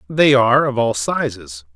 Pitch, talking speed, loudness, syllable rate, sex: 115 Hz, 170 wpm, -16 LUFS, 4.7 syllables/s, male